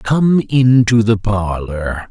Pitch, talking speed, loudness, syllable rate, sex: 110 Hz, 115 wpm, -14 LUFS, 3.0 syllables/s, male